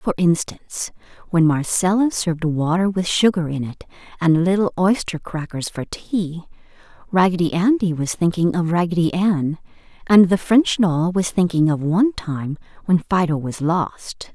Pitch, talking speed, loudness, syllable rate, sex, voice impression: 175 Hz, 150 wpm, -19 LUFS, 4.6 syllables/s, female, very feminine, very middle-aged, thin, slightly relaxed, slightly weak, bright, slightly soft, clear, fluent, slightly raspy, slightly cool, intellectual, slightly refreshing, sincere, very calm, friendly, reassuring, very unique, elegant, wild, lively, kind, slightly intense